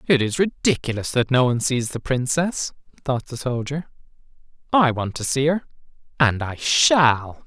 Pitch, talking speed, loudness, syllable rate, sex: 135 Hz, 160 wpm, -21 LUFS, 4.6 syllables/s, male